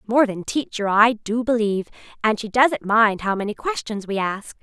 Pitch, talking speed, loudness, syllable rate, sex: 220 Hz, 195 wpm, -21 LUFS, 4.9 syllables/s, female